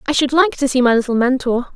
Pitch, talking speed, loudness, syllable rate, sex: 270 Hz, 275 wpm, -16 LUFS, 6.5 syllables/s, female